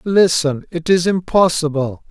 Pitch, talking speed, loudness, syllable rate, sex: 165 Hz, 85 wpm, -16 LUFS, 4.2 syllables/s, male